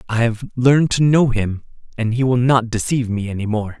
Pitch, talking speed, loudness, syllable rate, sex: 120 Hz, 220 wpm, -18 LUFS, 5.6 syllables/s, male